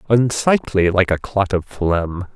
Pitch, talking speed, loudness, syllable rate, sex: 100 Hz, 155 wpm, -18 LUFS, 3.8 syllables/s, male